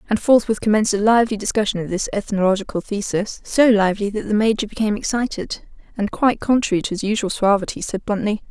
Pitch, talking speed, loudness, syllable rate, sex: 210 Hz, 175 wpm, -19 LUFS, 6.7 syllables/s, female